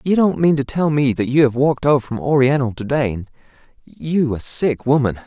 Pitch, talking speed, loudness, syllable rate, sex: 140 Hz, 205 wpm, -17 LUFS, 5.4 syllables/s, male